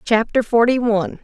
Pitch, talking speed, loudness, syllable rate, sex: 230 Hz, 145 wpm, -17 LUFS, 5.3 syllables/s, female